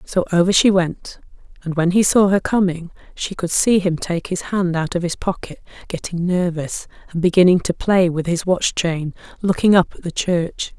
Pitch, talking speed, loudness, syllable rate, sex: 180 Hz, 195 wpm, -18 LUFS, 4.8 syllables/s, female